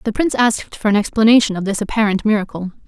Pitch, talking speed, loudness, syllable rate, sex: 215 Hz, 210 wpm, -16 LUFS, 7.2 syllables/s, female